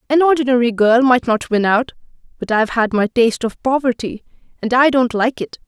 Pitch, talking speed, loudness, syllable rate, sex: 240 Hz, 200 wpm, -16 LUFS, 5.7 syllables/s, female